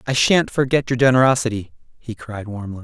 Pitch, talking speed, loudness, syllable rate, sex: 120 Hz, 170 wpm, -18 LUFS, 5.8 syllables/s, male